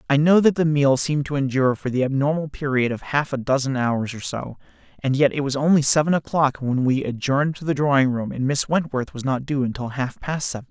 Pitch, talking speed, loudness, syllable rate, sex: 140 Hz, 240 wpm, -21 LUFS, 5.8 syllables/s, male